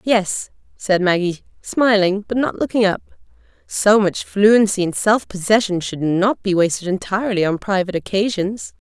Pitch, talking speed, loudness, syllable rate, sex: 200 Hz, 150 wpm, -18 LUFS, 4.7 syllables/s, female